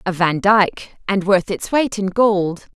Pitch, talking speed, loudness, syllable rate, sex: 195 Hz, 150 wpm, -17 LUFS, 4.1 syllables/s, female